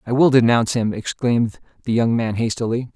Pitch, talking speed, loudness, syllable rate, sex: 115 Hz, 185 wpm, -19 LUFS, 6.1 syllables/s, male